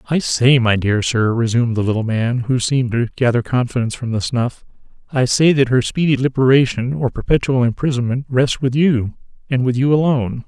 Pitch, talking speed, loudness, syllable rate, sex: 125 Hz, 185 wpm, -17 LUFS, 5.6 syllables/s, male